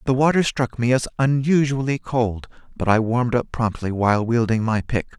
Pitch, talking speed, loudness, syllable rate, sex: 120 Hz, 185 wpm, -21 LUFS, 5.1 syllables/s, male